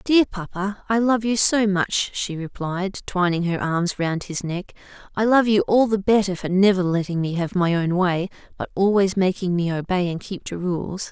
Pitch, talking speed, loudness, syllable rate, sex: 190 Hz, 205 wpm, -21 LUFS, 4.8 syllables/s, female